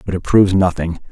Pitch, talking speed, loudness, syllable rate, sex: 90 Hz, 215 wpm, -15 LUFS, 6.6 syllables/s, male